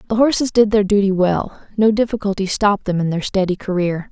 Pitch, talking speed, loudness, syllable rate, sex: 200 Hz, 205 wpm, -17 LUFS, 5.9 syllables/s, female